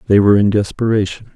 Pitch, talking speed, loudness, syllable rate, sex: 105 Hz, 175 wpm, -15 LUFS, 6.9 syllables/s, male